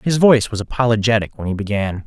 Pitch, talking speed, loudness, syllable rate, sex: 110 Hz, 205 wpm, -17 LUFS, 6.6 syllables/s, male